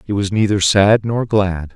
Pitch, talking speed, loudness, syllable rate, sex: 100 Hz, 205 wpm, -15 LUFS, 4.4 syllables/s, male